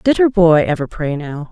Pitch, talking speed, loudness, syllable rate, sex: 170 Hz, 240 wpm, -15 LUFS, 4.8 syllables/s, female